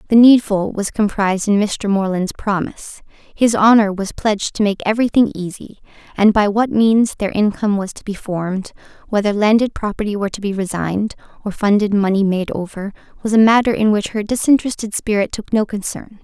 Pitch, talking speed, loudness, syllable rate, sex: 205 Hz, 180 wpm, -17 LUFS, 5.6 syllables/s, female